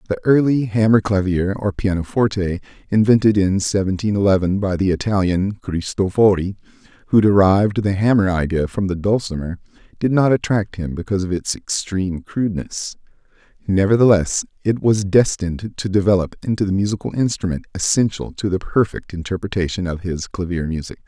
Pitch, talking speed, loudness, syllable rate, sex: 100 Hz, 140 wpm, -19 LUFS, 5.5 syllables/s, male